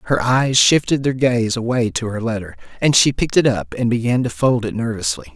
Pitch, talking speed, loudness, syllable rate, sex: 120 Hz, 225 wpm, -17 LUFS, 5.5 syllables/s, male